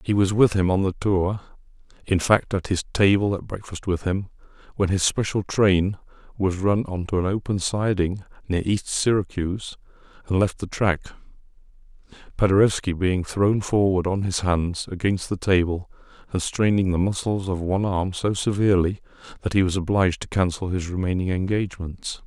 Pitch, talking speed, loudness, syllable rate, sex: 95 Hz, 165 wpm, -23 LUFS, 5.1 syllables/s, male